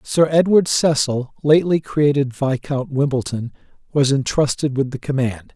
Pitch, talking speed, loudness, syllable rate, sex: 140 Hz, 130 wpm, -18 LUFS, 4.6 syllables/s, male